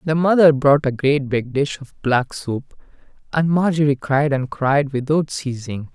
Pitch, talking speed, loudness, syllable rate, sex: 140 Hz, 170 wpm, -19 LUFS, 4.2 syllables/s, male